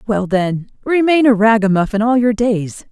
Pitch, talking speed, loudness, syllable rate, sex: 220 Hz, 165 wpm, -15 LUFS, 4.6 syllables/s, female